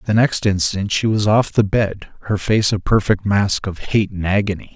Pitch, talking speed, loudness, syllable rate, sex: 100 Hz, 215 wpm, -18 LUFS, 4.8 syllables/s, male